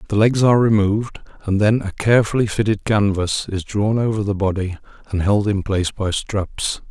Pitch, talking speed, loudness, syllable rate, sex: 105 Hz, 180 wpm, -19 LUFS, 5.3 syllables/s, male